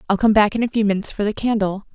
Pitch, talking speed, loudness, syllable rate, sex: 210 Hz, 310 wpm, -19 LUFS, 7.8 syllables/s, female